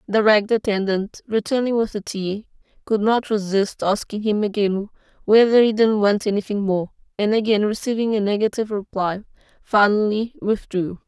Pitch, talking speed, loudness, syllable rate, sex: 210 Hz, 145 wpm, -20 LUFS, 5.1 syllables/s, female